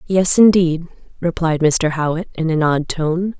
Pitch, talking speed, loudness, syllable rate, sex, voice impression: 165 Hz, 160 wpm, -17 LUFS, 4.2 syllables/s, female, feminine, adult-like, slightly cute, slightly intellectual, calm, slightly sweet